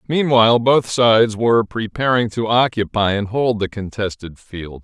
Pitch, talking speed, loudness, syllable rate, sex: 110 Hz, 150 wpm, -17 LUFS, 4.7 syllables/s, male